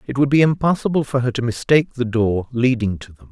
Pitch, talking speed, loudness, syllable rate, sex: 125 Hz, 235 wpm, -18 LUFS, 6.1 syllables/s, male